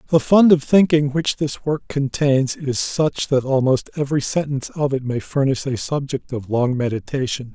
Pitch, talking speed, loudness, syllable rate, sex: 135 Hz, 185 wpm, -19 LUFS, 4.9 syllables/s, male